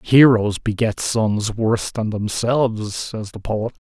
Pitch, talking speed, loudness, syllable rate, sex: 110 Hz, 140 wpm, -20 LUFS, 3.8 syllables/s, male